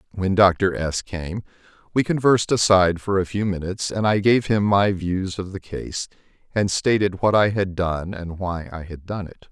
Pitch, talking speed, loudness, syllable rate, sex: 95 Hz, 200 wpm, -21 LUFS, 4.9 syllables/s, male